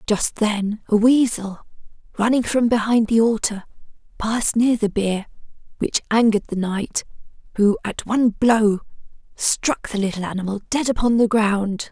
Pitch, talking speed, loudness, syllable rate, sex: 220 Hz, 145 wpm, -20 LUFS, 4.7 syllables/s, female